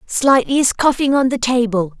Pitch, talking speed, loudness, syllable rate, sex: 250 Hz, 180 wpm, -15 LUFS, 4.8 syllables/s, female